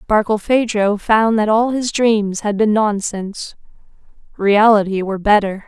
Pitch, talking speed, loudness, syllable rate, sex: 210 Hz, 125 wpm, -16 LUFS, 4.5 syllables/s, female